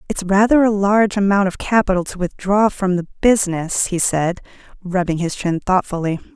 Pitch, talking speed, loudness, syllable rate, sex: 190 Hz, 170 wpm, -17 LUFS, 5.3 syllables/s, female